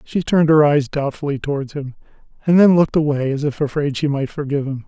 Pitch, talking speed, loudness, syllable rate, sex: 145 Hz, 220 wpm, -18 LUFS, 6.3 syllables/s, male